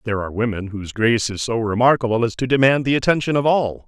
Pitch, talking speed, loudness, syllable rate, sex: 120 Hz, 230 wpm, -19 LUFS, 6.9 syllables/s, male